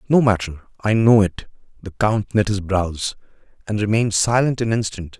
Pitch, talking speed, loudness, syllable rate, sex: 105 Hz, 175 wpm, -19 LUFS, 5.2 syllables/s, male